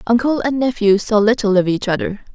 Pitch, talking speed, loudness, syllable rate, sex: 220 Hz, 205 wpm, -16 LUFS, 5.6 syllables/s, female